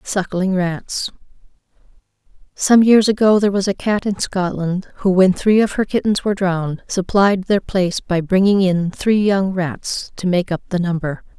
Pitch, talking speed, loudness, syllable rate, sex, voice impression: 190 Hz, 170 wpm, -17 LUFS, 4.8 syllables/s, female, feminine, adult-like, slightly weak, slightly soft, fluent, intellectual, calm, slightly reassuring, elegant, slightly kind, slightly modest